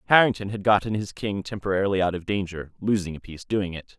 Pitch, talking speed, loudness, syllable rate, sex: 100 Hz, 210 wpm, -25 LUFS, 6.5 syllables/s, male